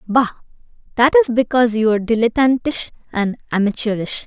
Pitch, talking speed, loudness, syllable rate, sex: 235 Hz, 125 wpm, -17 LUFS, 5.9 syllables/s, female